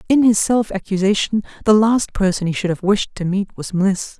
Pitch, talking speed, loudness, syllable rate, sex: 200 Hz, 215 wpm, -18 LUFS, 5.1 syllables/s, female